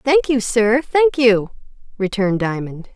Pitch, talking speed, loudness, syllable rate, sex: 230 Hz, 140 wpm, -17 LUFS, 4.5 syllables/s, female